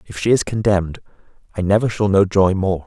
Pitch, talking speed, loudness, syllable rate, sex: 100 Hz, 210 wpm, -17 LUFS, 5.9 syllables/s, male